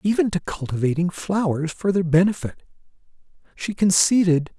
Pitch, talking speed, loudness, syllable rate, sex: 180 Hz, 120 wpm, -21 LUFS, 5.0 syllables/s, male